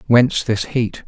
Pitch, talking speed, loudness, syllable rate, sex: 115 Hz, 165 wpm, -18 LUFS, 4.4 syllables/s, male